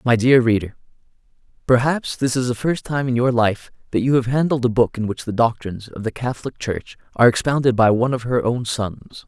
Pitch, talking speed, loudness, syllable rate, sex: 120 Hz, 215 wpm, -19 LUFS, 5.7 syllables/s, male